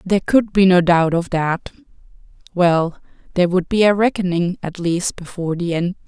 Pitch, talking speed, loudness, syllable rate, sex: 180 Hz, 180 wpm, -18 LUFS, 5.2 syllables/s, female